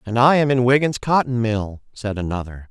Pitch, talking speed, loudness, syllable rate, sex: 120 Hz, 200 wpm, -19 LUFS, 5.2 syllables/s, male